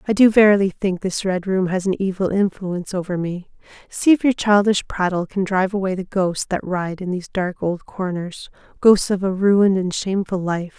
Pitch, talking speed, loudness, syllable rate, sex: 190 Hz, 200 wpm, -19 LUFS, 5.2 syllables/s, female